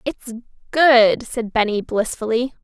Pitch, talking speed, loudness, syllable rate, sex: 235 Hz, 115 wpm, -18 LUFS, 3.9 syllables/s, female